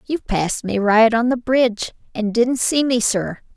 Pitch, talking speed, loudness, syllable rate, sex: 230 Hz, 200 wpm, -18 LUFS, 4.5 syllables/s, female